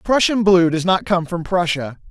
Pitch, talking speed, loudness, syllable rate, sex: 180 Hz, 200 wpm, -17 LUFS, 4.7 syllables/s, male